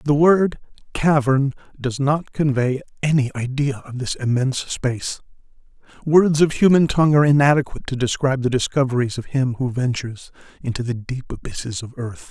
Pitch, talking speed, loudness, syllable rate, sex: 135 Hz, 155 wpm, -20 LUFS, 5.5 syllables/s, male